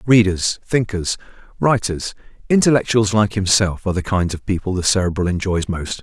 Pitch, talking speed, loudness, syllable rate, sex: 100 Hz, 130 wpm, -18 LUFS, 5.3 syllables/s, male